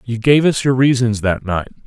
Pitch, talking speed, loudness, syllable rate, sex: 120 Hz, 225 wpm, -15 LUFS, 5.1 syllables/s, male